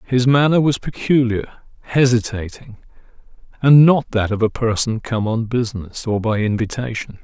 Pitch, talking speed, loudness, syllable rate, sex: 115 Hz, 140 wpm, -18 LUFS, 4.8 syllables/s, male